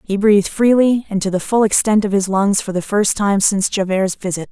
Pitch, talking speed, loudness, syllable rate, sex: 200 Hz, 240 wpm, -16 LUFS, 5.5 syllables/s, female